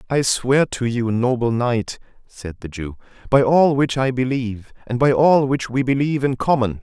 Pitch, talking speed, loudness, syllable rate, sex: 125 Hz, 195 wpm, -19 LUFS, 4.7 syllables/s, male